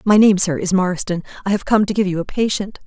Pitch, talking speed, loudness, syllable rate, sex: 195 Hz, 270 wpm, -18 LUFS, 6.0 syllables/s, female